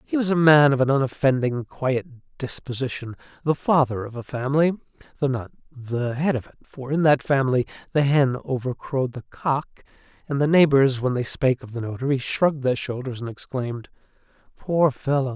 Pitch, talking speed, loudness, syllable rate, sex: 135 Hz, 175 wpm, -23 LUFS, 5.6 syllables/s, male